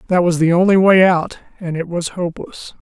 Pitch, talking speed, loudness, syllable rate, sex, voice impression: 175 Hz, 190 wpm, -15 LUFS, 5.3 syllables/s, male, masculine, adult-like, tensed, powerful, slightly bright, muffled, fluent, intellectual, friendly, unique, lively, slightly modest, slightly light